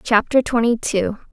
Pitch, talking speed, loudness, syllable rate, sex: 230 Hz, 135 wpm, -18 LUFS, 4.4 syllables/s, female